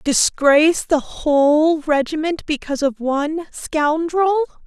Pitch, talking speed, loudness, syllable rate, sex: 305 Hz, 105 wpm, -18 LUFS, 4.1 syllables/s, female